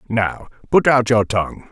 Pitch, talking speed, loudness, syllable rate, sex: 115 Hz, 175 wpm, -17 LUFS, 4.8 syllables/s, male